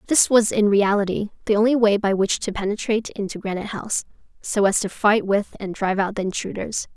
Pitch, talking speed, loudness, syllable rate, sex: 205 Hz, 205 wpm, -21 LUFS, 6.0 syllables/s, female